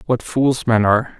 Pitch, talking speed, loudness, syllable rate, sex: 120 Hz, 200 wpm, -17 LUFS, 4.8 syllables/s, male